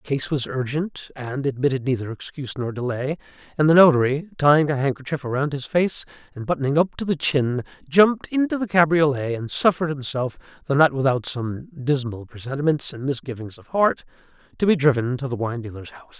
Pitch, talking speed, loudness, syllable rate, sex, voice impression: 140 Hz, 185 wpm, -22 LUFS, 5.8 syllables/s, male, very masculine, adult-like, slightly fluent, slightly refreshing, sincere, slightly friendly